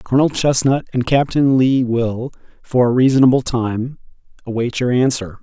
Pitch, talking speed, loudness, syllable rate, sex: 125 Hz, 145 wpm, -16 LUFS, 4.9 syllables/s, male